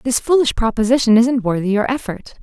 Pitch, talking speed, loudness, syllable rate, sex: 235 Hz, 175 wpm, -16 LUFS, 5.8 syllables/s, female